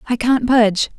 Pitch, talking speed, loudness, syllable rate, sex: 235 Hz, 185 wpm, -15 LUFS, 5.1 syllables/s, female